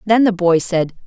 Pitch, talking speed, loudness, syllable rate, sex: 190 Hz, 225 wpm, -16 LUFS, 4.7 syllables/s, female